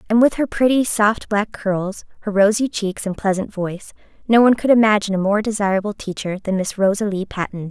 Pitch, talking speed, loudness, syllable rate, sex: 205 Hz, 195 wpm, -19 LUFS, 5.7 syllables/s, female